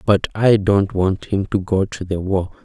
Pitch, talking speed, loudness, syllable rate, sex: 95 Hz, 225 wpm, -18 LUFS, 4.2 syllables/s, male